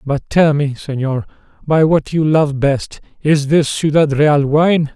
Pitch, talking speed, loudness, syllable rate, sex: 150 Hz, 170 wpm, -15 LUFS, 3.9 syllables/s, male